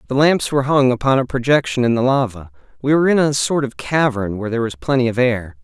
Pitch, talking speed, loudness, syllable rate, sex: 130 Hz, 245 wpm, -17 LUFS, 6.5 syllables/s, male